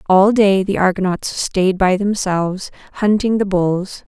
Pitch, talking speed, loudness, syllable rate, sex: 190 Hz, 145 wpm, -16 LUFS, 4.2 syllables/s, female